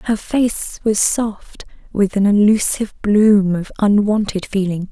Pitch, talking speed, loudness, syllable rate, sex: 205 Hz, 135 wpm, -16 LUFS, 3.9 syllables/s, female